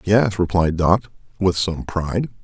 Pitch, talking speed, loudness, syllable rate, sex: 95 Hz, 150 wpm, -20 LUFS, 4.2 syllables/s, male